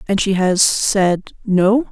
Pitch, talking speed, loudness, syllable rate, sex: 200 Hz, 155 wpm, -16 LUFS, 3.1 syllables/s, female